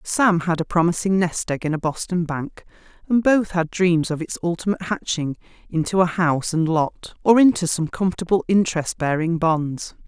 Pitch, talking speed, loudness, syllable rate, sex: 175 Hz, 180 wpm, -21 LUFS, 5.1 syllables/s, female